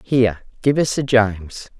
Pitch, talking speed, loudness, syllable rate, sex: 115 Hz, 170 wpm, -18 LUFS, 4.7 syllables/s, female